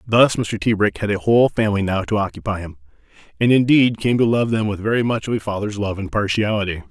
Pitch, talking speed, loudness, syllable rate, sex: 105 Hz, 225 wpm, -19 LUFS, 6.2 syllables/s, male